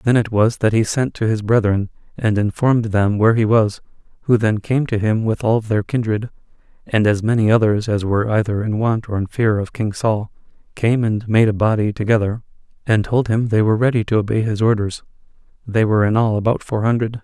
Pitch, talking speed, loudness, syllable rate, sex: 110 Hz, 215 wpm, -18 LUFS, 5.6 syllables/s, male